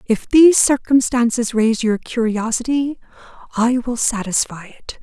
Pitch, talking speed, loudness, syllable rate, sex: 235 Hz, 120 wpm, -17 LUFS, 4.7 syllables/s, female